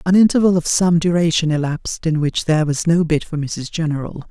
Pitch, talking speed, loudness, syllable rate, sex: 160 Hz, 210 wpm, -17 LUFS, 5.7 syllables/s, female